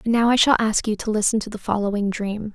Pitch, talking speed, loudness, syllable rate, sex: 215 Hz, 285 wpm, -21 LUFS, 6.1 syllables/s, female